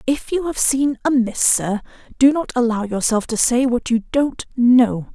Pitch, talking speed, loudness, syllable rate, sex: 245 Hz, 185 wpm, -18 LUFS, 4.3 syllables/s, female